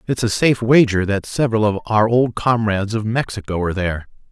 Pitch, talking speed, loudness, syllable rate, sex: 110 Hz, 195 wpm, -18 LUFS, 6.1 syllables/s, male